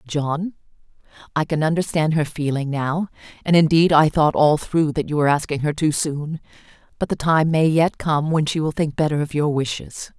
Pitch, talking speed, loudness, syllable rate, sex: 155 Hz, 200 wpm, -20 LUFS, 5.3 syllables/s, female